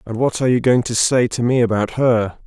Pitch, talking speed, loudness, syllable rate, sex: 120 Hz, 270 wpm, -17 LUFS, 5.7 syllables/s, male